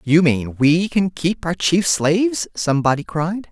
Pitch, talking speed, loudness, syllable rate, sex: 160 Hz, 170 wpm, -18 LUFS, 4.2 syllables/s, male